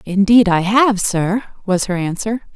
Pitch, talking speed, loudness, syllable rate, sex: 200 Hz, 165 wpm, -16 LUFS, 4.0 syllables/s, female